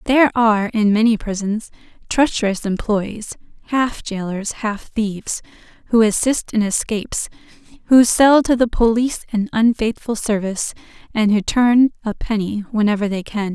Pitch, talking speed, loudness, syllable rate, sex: 220 Hz, 135 wpm, -18 LUFS, 4.8 syllables/s, female